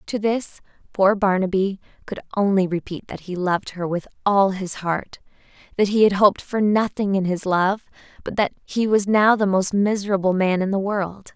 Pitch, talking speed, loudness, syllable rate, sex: 195 Hz, 190 wpm, -21 LUFS, 5.0 syllables/s, female